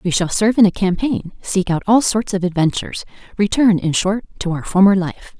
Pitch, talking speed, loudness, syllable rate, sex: 195 Hz, 200 wpm, -17 LUFS, 5.4 syllables/s, female